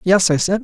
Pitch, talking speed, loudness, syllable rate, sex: 190 Hz, 285 wpm, -15 LUFS, 5.7 syllables/s, male